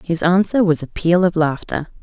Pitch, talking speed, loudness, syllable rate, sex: 175 Hz, 205 wpm, -17 LUFS, 4.9 syllables/s, female